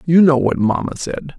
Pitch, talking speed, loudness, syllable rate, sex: 145 Hz, 215 wpm, -16 LUFS, 4.9 syllables/s, male